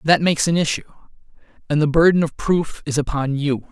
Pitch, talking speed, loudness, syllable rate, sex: 155 Hz, 195 wpm, -19 LUFS, 5.9 syllables/s, male